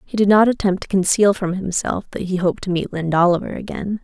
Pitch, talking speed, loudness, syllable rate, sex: 190 Hz, 240 wpm, -19 LUFS, 6.2 syllables/s, female